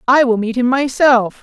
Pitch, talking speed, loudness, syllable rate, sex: 250 Hz, 210 wpm, -14 LUFS, 4.7 syllables/s, female